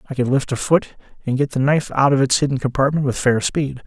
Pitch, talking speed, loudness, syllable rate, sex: 135 Hz, 265 wpm, -18 LUFS, 6.1 syllables/s, male